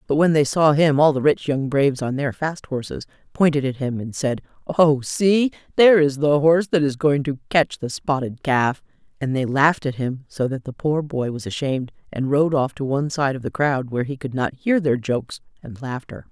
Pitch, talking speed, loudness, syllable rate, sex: 140 Hz, 230 wpm, -20 LUFS, 5.3 syllables/s, female